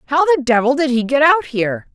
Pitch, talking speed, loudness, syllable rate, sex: 260 Hz, 245 wpm, -15 LUFS, 5.9 syllables/s, female